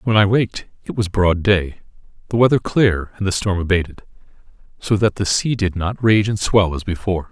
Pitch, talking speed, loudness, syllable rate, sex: 100 Hz, 205 wpm, -18 LUFS, 5.4 syllables/s, male